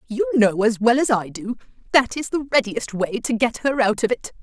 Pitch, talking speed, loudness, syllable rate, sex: 225 Hz, 245 wpm, -20 LUFS, 5.2 syllables/s, female